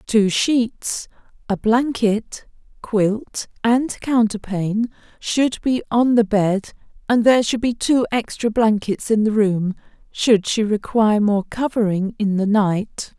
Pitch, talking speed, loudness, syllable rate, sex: 220 Hz, 135 wpm, -19 LUFS, 3.8 syllables/s, female